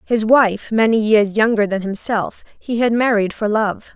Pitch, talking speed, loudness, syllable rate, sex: 215 Hz, 180 wpm, -17 LUFS, 4.3 syllables/s, female